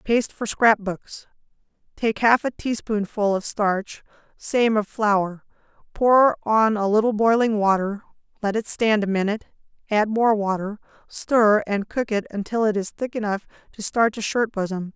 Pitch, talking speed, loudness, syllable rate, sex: 215 Hz, 160 wpm, -22 LUFS, 4.6 syllables/s, female